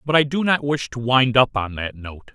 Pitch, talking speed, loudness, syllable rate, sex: 125 Hz, 280 wpm, -20 LUFS, 4.9 syllables/s, male